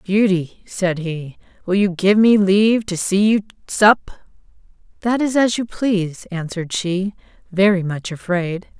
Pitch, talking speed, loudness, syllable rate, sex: 195 Hz, 150 wpm, -18 LUFS, 4.1 syllables/s, female